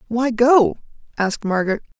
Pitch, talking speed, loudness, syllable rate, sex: 230 Hz, 120 wpm, -18 LUFS, 5.6 syllables/s, female